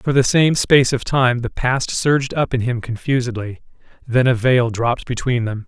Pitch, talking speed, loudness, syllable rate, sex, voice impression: 125 Hz, 200 wpm, -18 LUFS, 5.0 syllables/s, male, masculine, adult-like, bright, clear, fluent, intellectual, sincere, friendly, reassuring, lively, kind